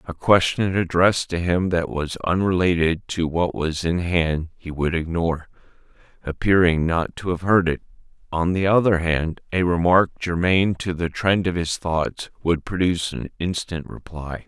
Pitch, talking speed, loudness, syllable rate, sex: 85 Hz, 165 wpm, -21 LUFS, 4.6 syllables/s, male